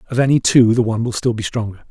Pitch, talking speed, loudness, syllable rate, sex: 115 Hz, 285 wpm, -16 LUFS, 7.4 syllables/s, male